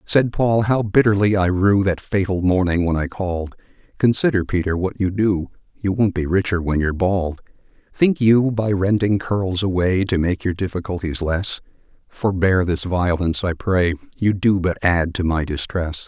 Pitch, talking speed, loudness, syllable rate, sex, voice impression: 95 Hz, 175 wpm, -19 LUFS, 4.7 syllables/s, male, very masculine, very adult-like, old, very thick, tensed, very powerful, bright, very soft, muffled, fluent, raspy, very cool, very intellectual, slightly refreshing, very sincere, very calm, very mature, very friendly, very reassuring, very unique, elegant, very wild, very sweet, kind